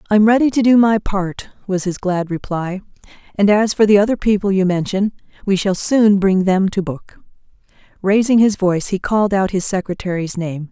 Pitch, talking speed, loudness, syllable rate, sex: 195 Hz, 195 wpm, -16 LUFS, 5.3 syllables/s, female